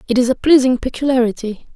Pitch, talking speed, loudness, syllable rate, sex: 250 Hz, 170 wpm, -15 LUFS, 6.6 syllables/s, female